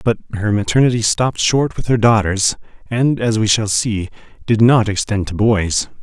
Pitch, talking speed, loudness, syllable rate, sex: 110 Hz, 180 wpm, -16 LUFS, 4.8 syllables/s, male